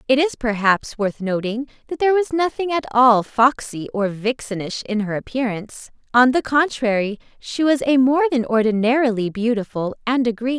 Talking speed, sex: 170 wpm, female